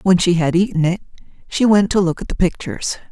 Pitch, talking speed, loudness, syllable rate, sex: 185 Hz, 230 wpm, -17 LUFS, 6.2 syllables/s, female